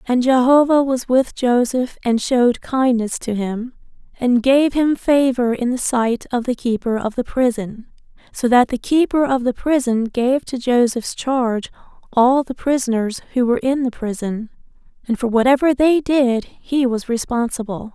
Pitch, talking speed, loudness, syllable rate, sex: 250 Hz, 165 wpm, -18 LUFS, 4.5 syllables/s, female